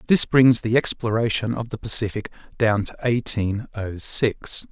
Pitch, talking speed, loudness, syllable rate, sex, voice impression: 115 Hz, 155 wpm, -21 LUFS, 4.5 syllables/s, male, masculine, middle-aged, tensed, bright, slightly muffled, intellectual, friendly, reassuring, lively, kind